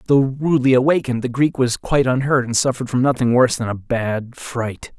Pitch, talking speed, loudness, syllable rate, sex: 125 Hz, 205 wpm, -18 LUFS, 5.9 syllables/s, male